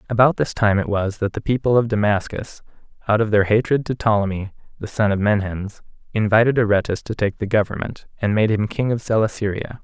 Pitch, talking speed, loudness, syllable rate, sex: 105 Hz, 195 wpm, -20 LUFS, 5.4 syllables/s, male